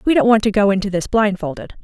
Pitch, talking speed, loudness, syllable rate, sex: 205 Hz, 260 wpm, -17 LUFS, 6.4 syllables/s, female